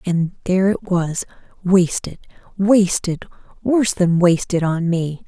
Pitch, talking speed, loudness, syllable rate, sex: 180 Hz, 115 wpm, -18 LUFS, 4.1 syllables/s, female